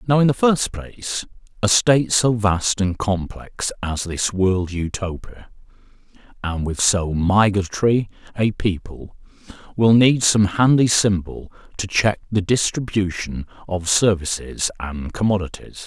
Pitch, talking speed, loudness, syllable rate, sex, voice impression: 100 Hz, 130 wpm, -19 LUFS, 4.1 syllables/s, male, masculine, middle-aged, tensed, powerful, hard, halting, raspy, calm, mature, reassuring, slightly wild, strict, modest